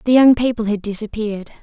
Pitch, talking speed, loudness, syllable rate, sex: 220 Hz, 185 wpm, -17 LUFS, 6.4 syllables/s, female